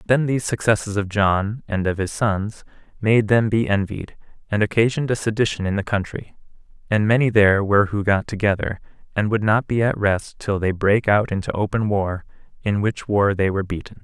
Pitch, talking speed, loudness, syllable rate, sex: 105 Hz, 200 wpm, -20 LUFS, 5.6 syllables/s, male